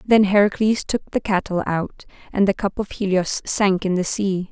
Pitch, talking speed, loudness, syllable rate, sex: 195 Hz, 200 wpm, -20 LUFS, 4.8 syllables/s, female